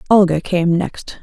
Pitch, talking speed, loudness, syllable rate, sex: 180 Hz, 145 wpm, -16 LUFS, 4.0 syllables/s, female